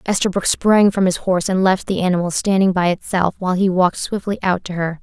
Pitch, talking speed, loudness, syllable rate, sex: 185 Hz, 225 wpm, -17 LUFS, 5.9 syllables/s, female